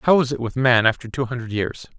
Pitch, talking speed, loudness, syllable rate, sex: 125 Hz, 270 wpm, -21 LUFS, 5.9 syllables/s, male